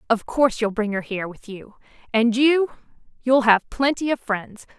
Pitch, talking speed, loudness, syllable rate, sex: 235 Hz, 175 wpm, -21 LUFS, 4.9 syllables/s, female